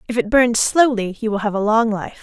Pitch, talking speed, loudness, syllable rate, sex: 220 Hz, 270 wpm, -17 LUFS, 5.5 syllables/s, female